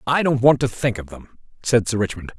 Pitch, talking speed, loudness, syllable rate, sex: 115 Hz, 250 wpm, -20 LUFS, 6.0 syllables/s, male